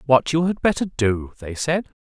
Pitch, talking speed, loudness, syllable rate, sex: 140 Hz, 205 wpm, -21 LUFS, 4.7 syllables/s, male